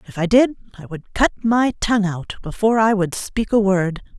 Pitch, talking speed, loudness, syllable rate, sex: 205 Hz, 215 wpm, -18 LUFS, 5.4 syllables/s, female